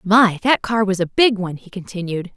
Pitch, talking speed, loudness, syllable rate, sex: 200 Hz, 230 wpm, -18 LUFS, 5.5 syllables/s, female